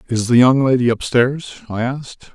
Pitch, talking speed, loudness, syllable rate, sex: 125 Hz, 180 wpm, -16 LUFS, 4.8 syllables/s, male